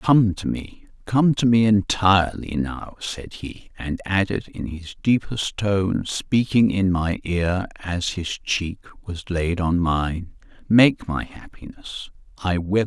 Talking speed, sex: 150 wpm, male